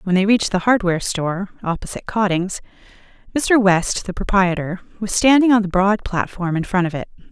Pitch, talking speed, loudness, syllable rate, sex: 195 Hz, 180 wpm, -18 LUFS, 5.7 syllables/s, female